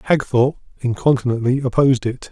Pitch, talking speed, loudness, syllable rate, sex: 125 Hz, 105 wpm, -18 LUFS, 6.5 syllables/s, male